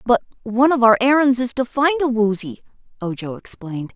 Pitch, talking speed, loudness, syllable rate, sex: 240 Hz, 180 wpm, -18 LUFS, 5.5 syllables/s, female